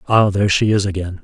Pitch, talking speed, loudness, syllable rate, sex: 100 Hz, 245 wpm, -16 LUFS, 6.5 syllables/s, male